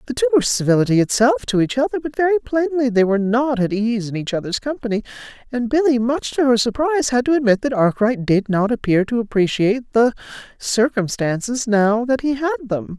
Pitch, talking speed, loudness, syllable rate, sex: 240 Hz, 200 wpm, -18 LUFS, 5.8 syllables/s, female